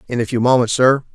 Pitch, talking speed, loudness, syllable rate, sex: 125 Hz, 260 wpm, -16 LUFS, 6.6 syllables/s, male